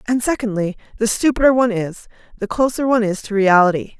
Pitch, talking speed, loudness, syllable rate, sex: 220 Hz, 180 wpm, -17 LUFS, 6.3 syllables/s, female